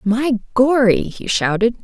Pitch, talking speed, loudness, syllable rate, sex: 235 Hz, 130 wpm, -17 LUFS, 3.9 syllables/s, female